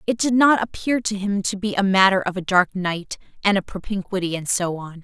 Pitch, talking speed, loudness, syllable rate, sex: 195 Hz, 240 wpm, -21 LUFS, 5.4 syllables/s, female